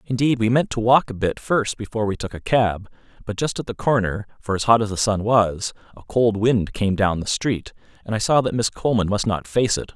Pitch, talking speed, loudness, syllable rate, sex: 110 Hz, 255 wpm, -21 LUFS, 5.5 syllables/s, male